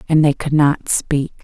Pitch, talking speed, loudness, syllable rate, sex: 145 Hz, 210 wpm, -16 LUFS, 4.2 syllables/s, female